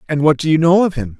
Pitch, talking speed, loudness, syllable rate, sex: 160 Hz, 350 wpm, -14 LUFS, 6.9 syllables/s, male